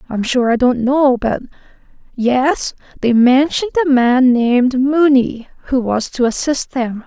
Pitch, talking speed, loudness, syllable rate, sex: 255 Hz, 145 wpm, -15 LUFS, 4.1 syllables/s, female